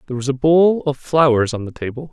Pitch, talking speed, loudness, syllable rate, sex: 140 Hz, 255 wpm, -17 LUFS, 6.2 syllables/s, male